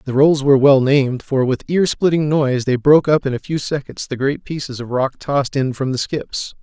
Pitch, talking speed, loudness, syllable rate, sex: 140 Hz, 245 wpm, -17 LUFS, 5.5 syllables/s, male